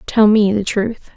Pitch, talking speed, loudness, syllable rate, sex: 210 Hz, 205 wpm, -15 LUFS, 4.0 syllables/s, female